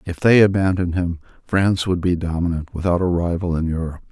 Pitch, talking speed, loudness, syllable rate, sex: 90 Hz, 190 wpm, -19 LUFS, 6.3 syllables/s, male